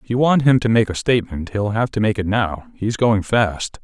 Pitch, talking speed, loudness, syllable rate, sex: 110 Hz, 265 wpm, -18 LUFS, 5.3 syllables/s, male